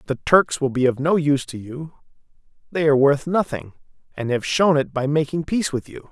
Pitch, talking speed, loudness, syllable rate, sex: 145 Hz, 215 wpm, -20 LUFS, 5.7 syllables/s, male